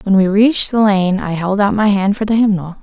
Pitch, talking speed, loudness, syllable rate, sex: 200 Hz, 275 wpm, -14 LUFS, 5.6 syllables/s, female